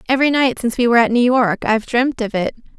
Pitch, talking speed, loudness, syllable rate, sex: 240 Hz, 260 wpm, -16 LUFS, 7.1 syllables/s, female